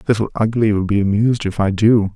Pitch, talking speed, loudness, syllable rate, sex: 105 Hz, 225 wpm, -16 LUFS, 6.1 syllables/s, male